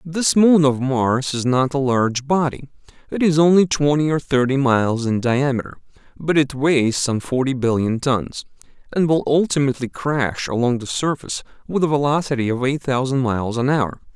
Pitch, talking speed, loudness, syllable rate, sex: 135 Hz, 175 wpm, -19 LUFS, 5.1 syllables/s, male